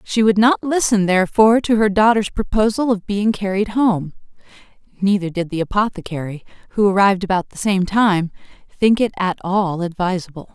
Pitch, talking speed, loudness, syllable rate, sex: 200 Hz, 160 wpm, -17 LUFS, 5.4 syllables/s, female